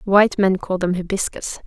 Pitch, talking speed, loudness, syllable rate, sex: 190 Hz, 180 wpm, -20 LUFS, 5.3 syllables/s, female